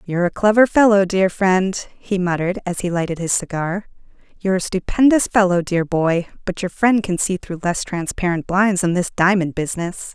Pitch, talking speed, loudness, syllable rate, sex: 185 Hz, 190 wpm, -18 LUFS, 5.2 syllables/s, female